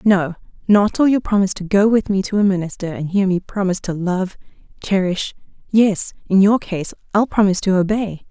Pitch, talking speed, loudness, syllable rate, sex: 195 Hz, 190 wpm, -18 LUFS, 5.5 syllables/s, female